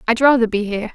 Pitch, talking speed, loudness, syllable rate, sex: 230 Hz, 255 wpm, -17 LUFS, 7.6 syllables/s, female